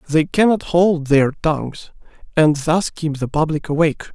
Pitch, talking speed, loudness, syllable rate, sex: 160 Hz, 160 wpm, -18 LUFS, 4.7 syllables/s, male